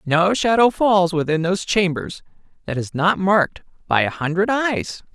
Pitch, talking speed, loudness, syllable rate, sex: 180 Hz, 165 wpm, -19 LUFS, 4.7 syllables/s, male